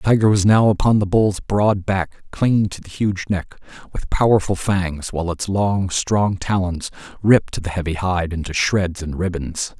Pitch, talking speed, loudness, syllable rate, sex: 95 Hz, 185 wpm, -19 LUFS, 4.6 syllables/s, male